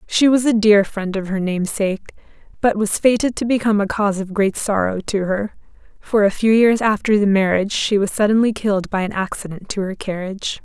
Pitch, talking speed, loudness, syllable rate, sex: 205 Hz, 210 wpm, -18 LUFS, 5.8 syllables/s, female